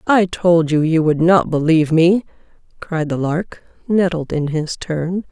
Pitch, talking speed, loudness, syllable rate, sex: 165 Hz, 170 wpm, -17 LUFS, 4.2 syllables/s, female